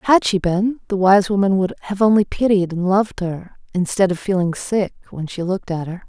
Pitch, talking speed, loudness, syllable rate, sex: 190 Hz, 215 wpm, -19 LUFS, 5.4 syllables/s, female